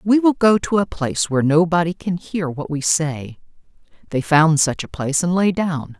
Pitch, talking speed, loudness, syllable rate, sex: 165 Hz, 210 wpm, -18 LUFS, 5.0 syllables/s, female